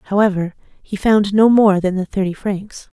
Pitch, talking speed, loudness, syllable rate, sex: 200 Hz, 180 wpm, -16 LUFS, 4.4 syllables/s, female